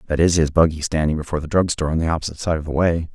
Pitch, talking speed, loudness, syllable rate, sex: 80 Hz, 305 wpm, -20 LUFS, 8.1 syllables/s, male